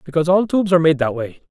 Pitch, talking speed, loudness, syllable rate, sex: 165 Hz, 280 wpm, -16 LUFS, 8.2 syllables/s, male